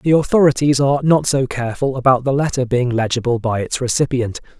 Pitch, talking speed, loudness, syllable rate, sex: 130 Hz, 185 wpm, -17 LUFS, 6.0 syllables/s, male